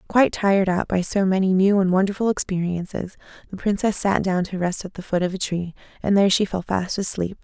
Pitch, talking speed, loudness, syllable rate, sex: 190 Hz, 225 wpm, -21 LUFS, 5.9 syllables/s, female